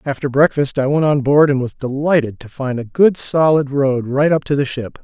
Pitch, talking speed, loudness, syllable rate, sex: 140 Hz, 240 wpm, -16 LUFS, 5.1 syllables/s, male